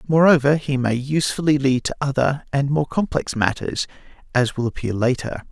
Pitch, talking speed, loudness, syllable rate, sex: 140 Hz, 165 wpm, -20 LUFS, 5.3 syllables/s, male